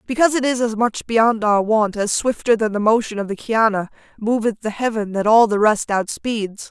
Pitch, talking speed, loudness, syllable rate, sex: 220 Hz, 215 wpm, -18 LUFS, 5.1 syllables/s, female